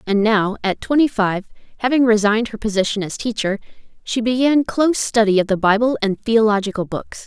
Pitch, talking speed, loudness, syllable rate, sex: 220 Hz, 175 wpm, -18 LUFS, 5.6 syllables/s, female